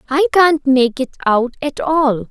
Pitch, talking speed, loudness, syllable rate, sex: 290 Hz, 185 wpm, -15 LUFS, 3.9 syllables/s, female